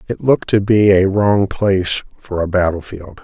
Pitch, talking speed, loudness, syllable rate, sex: 95 Hz, 205 wpm, -15 LUFS, 4.8 syllables/s, male